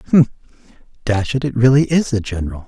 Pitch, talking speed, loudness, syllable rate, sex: 120 Hz, 180 wpm, -17 LUFS, 5.8 syllables/s, male